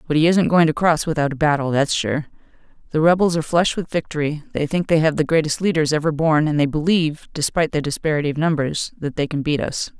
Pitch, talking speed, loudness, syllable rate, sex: 155 Hz, 235 wpm, -19 LUFS, 6.4 syllables/s, female